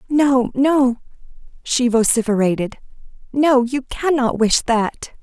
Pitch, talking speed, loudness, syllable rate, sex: 250 Hz, 105 wpm, -17 LUFS, 3.7 syllables/s, female